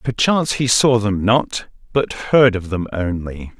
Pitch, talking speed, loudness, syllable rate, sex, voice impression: 110 Hz, 165 wpm, -17 LUFS, 4.1 syllables/s, male, masculine, slightly middle-aged, cool, sincere, slightly wild